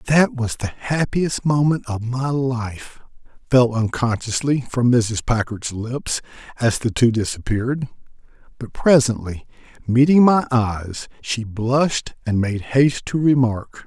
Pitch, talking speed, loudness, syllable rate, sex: 120 Hz, 130 wpm, -19 LUFS, 4.0 syllables/s, male